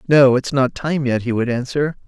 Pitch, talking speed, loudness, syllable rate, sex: 135 Hz, 230 wpm, -18 LUFS, 4.9 syllables/s, male